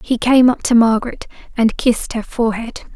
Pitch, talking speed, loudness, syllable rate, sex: 235 Hz, 185 wpm, -15 LUFS, 5.6 syllables/s, female